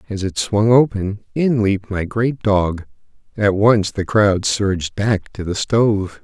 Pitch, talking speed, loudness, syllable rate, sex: 105 Hz, 175 wpm, -18 LUFS, 4.1 syllables/s, male